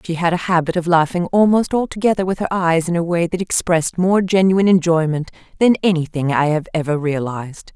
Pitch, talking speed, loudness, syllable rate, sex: 175 Hz, 195 wpm, -17 LUFS, 5.9 syllables/s, female